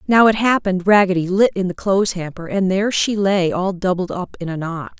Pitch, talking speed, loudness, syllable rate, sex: 190 Hz, 230 wpm, -18 LUFS, 5.7 syllables/s, female